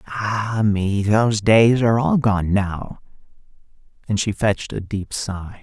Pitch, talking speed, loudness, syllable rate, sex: 105 Hz, 150 wpm, -19 LUFS, 3.9 syllables/s, male